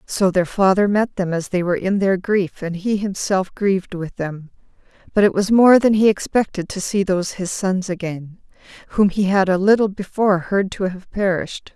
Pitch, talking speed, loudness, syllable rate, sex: 190 Hz, 205 wpm, -19 LUFS, 5.1 syllables/s, female